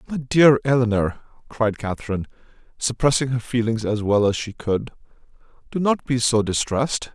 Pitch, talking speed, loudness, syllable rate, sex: 120 Hz, 150 wpm, -21 LUFS, 5.3 syllables/s, male